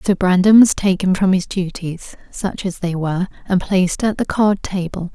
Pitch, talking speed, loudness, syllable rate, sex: 185 Hz, 200 wpm, -17 LUFS, 5.0 syllables/s, female